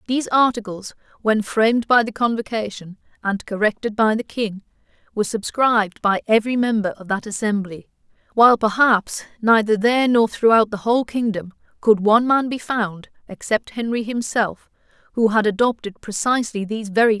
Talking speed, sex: 160 wpm, female